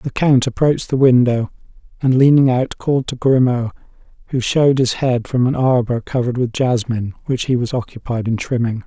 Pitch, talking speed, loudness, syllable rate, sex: 125 Hz, 185 wpm, -17 LUFS, 5.5 syllables/s, male